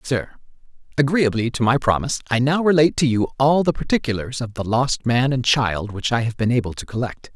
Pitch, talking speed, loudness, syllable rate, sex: 125 Hz, 205 wpm, -20 LUFS, 5.7 syllables/s, male